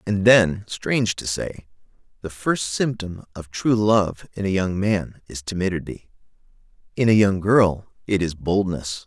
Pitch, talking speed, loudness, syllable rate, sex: 95 Hz, 160 wpm, -21 LUFS, 4.1 syllables/s, male